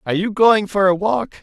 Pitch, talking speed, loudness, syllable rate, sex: 195 Hz, 255 wpm, -16 LUFS, 5.3 syllables/s, male